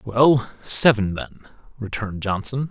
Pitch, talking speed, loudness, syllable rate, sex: 115 Hz, 110 wpm, -20 LUFS, 4.2 syllables/s, male